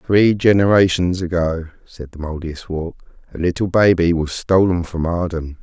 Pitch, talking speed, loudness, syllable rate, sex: 85 Hz, 140 wpm, -17 LUFS, 4.7 syllables/s, male